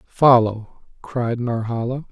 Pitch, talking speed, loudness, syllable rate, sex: 120 Hz, 85 wpm, -19 LUFS, 3.4 syllables/s, male